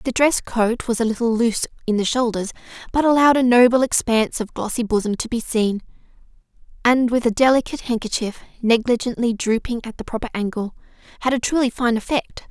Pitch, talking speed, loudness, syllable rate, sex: 235 Hz, 175 wpm, -20 LUFS, 6.1 syllables/s, female